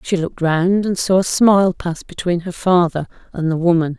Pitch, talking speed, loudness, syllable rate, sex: 175 Hz, 210 wpm, -17 LUFS, 5.2 syllables/s, female